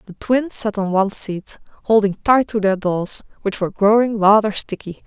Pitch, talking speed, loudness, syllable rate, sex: 205 Hz, 190 wpm, -18 LUFS, 5.0 syllables/s, female